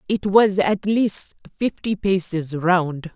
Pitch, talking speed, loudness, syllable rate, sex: 185 Hz, 135 wpm, -20 LUFS, 3.3 syllables/s, female